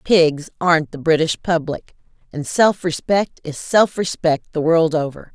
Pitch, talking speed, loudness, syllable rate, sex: 165 Hz, 155 wpm, -18 LUFS, 4.3 syllables/s, female